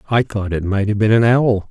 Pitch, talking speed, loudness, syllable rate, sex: 105 Hz, 280 wpm, -16 LUFS, 5.4 syllables/s, male